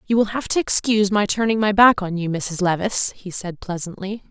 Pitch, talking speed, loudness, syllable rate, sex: 200 Hz, 225 wpm, -20 LUFS, 5.6 syllables/s, female